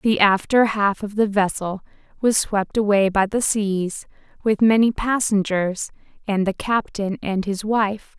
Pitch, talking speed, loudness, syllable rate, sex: 205 Hz, 155 wpm, -20 LUFS, 4.0 syllables/s, female